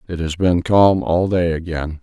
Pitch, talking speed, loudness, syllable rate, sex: 85 Hz, 210 wpm, -17 LUFS, 4.3 syllables/s, male